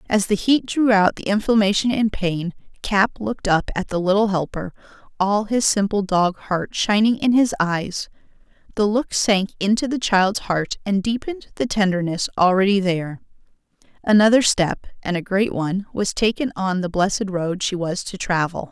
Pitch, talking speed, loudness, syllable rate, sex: 200 Hz, 175 wpm, -20 LUFS, 4.9 syllables/s, female